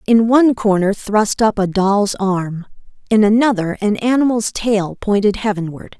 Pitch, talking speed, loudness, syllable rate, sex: 210 Hz, 150 wpm, -16 LUFS, 4.5 syllables/s, female